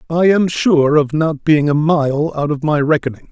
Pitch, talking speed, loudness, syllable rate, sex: 150 Hz, 215 wpm, -15 LUFS, 4.5 syllables/s, male